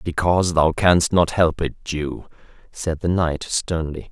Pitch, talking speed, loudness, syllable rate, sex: 80 Hz, 160 wpm, -20 LUFS, 4.0 syllables/s, male